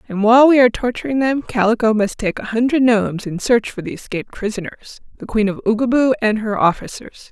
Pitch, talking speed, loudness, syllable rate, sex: 225 Hz, 195 wpm, -17 LUFS, 6.0 syllables/s, female